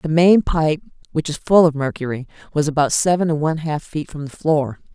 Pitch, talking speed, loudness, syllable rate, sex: 155 Hz, 220 wpm, -19 LUFS, 5.5 syllables/s, female